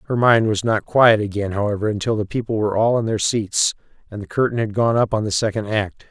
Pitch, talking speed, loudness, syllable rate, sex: 110 Hz, 245 wpm, -19 LUFS, 6.0 syllables/s, male